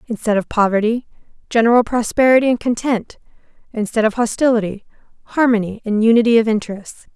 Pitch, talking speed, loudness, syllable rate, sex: 225 Hz, 125 wpm, -16 LUFS, 6.1 syllables/s, female